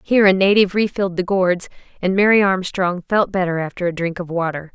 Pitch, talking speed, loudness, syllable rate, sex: 185 Hz, 200 wpm, -18 LUFS, 6.0 syllables/s, female